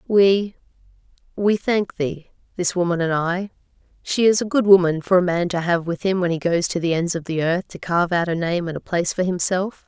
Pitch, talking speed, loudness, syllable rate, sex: 180 Hz, 230 wpm, -20 LUFS, 5.4 syllables/s, female